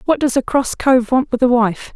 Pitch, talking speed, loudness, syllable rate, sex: 250 Hz, 275 wpm, -16 LUFS, 5.0 syllables/s, female